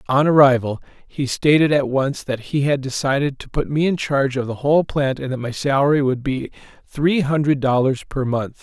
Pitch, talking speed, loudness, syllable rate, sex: 135 Hz, 210 wpm, -19 LUFS, 5.3 syllables/s, male